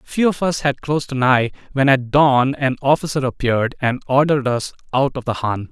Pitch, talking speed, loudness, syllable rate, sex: 135 Hz, 210 wpm, -18 LUFS, 5.3 syllables/s, male